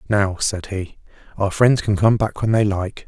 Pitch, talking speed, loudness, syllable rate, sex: 100 Hz, 215 wpm, -19 LUFS, 4.4 syllables/s, male